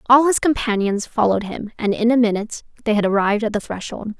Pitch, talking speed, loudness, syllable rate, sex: 220 Hz, 215 wpm, -19 LUFS, 6.5 syllables/s, female